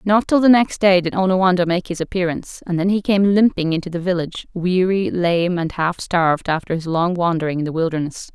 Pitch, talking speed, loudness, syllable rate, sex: 180 Hz, 215 wpm, -18 LUFS, 5.8 syllables/s, female